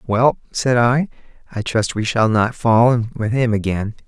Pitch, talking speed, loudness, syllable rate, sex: 115 Hz, 190 wpm, -18 LUFS, 4.2 syllables/s, male